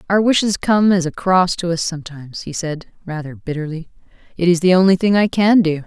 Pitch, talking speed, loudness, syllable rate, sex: 175 Hz, 215 wpm, -17 LUFS, 5.8 syllables/s, female